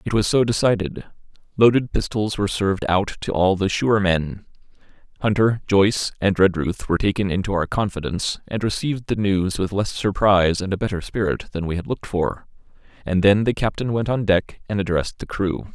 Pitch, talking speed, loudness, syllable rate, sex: 100 Hz, 190 wpm, -21 LUFS, 5.6 syllables/s, male